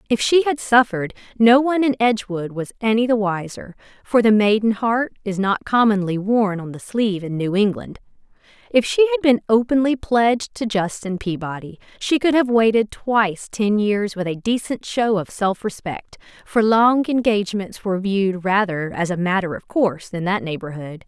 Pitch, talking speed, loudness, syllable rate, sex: 210 Hz, 180 wpm, -19 LUFS, 5.1 syllables/s, female